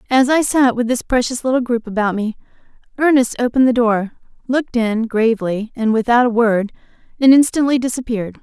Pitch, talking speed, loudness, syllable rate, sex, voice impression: 240 Hz, 170 wpm, -16 LUFS, 5.8 syllables/s, female, feminine, adult-like, slightly relaxed, bright, soft, fluent, intellectual, calm, friendly, elegant, lively, slightly sharp